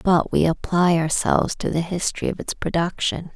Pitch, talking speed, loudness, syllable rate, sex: 170 Hz, 180 wpm, -21 LUFS, 5.3 syllables/s, female